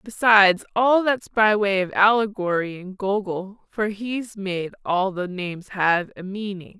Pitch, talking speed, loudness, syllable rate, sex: 200 Hz, 160 wpm, -21 LUFS, 4.1 syllables/s, female